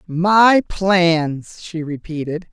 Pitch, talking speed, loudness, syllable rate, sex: 170 Hz, 95 wpm, -16 LUFS, 2.6 syllables/s, female